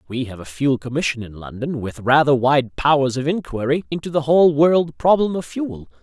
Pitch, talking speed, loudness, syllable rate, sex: 140 Hz, 200 wpm, -19 LUFS, 5.3 syllables/s, male